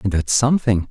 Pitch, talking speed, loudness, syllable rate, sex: 110 Hz, 200 wpm, -17 LUFS, 6.2 syllables/s, male